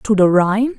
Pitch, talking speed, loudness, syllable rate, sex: 210 Hz, 230 wpm, -14 LUFS, 5.5 syllables/s, female